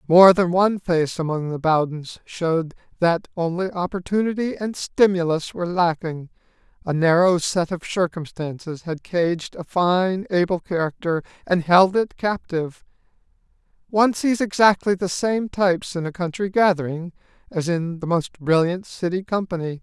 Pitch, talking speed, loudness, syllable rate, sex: 175 Hz, 140 wpm, -21 LUFS, 4.7 syllables/s, male